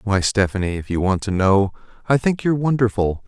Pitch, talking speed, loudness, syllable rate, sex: 105 Hz, 200 wpm, -19 LUFS, 5.7 syllables/s, male